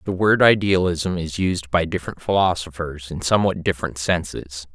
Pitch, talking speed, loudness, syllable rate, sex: 85 Hz, 150 wpm, -21 LUFS, 5.2 syllables/s, male